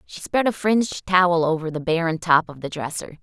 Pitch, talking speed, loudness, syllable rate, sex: 170 Hz, 225 wpm, -21 LUFS, 5.5 syllables/s, female